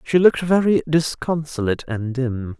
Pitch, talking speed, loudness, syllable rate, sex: 145 Hz, 140 wpm, -20 LUFS, 5.0 syllables/s, male